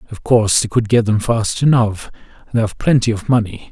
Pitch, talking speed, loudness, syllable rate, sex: 110 Hz, 210 wpm, -16 LUFS, 5.6 syllables/s, male